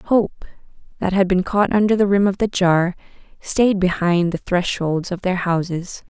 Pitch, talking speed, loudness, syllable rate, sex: 185 Hz, 175 wpm, -19 LUFS, 4.5 syllables/s, female